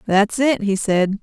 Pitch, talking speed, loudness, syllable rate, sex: 210 Hz, 195 wpm, -18 LUFS, 3.7 syllables/s, female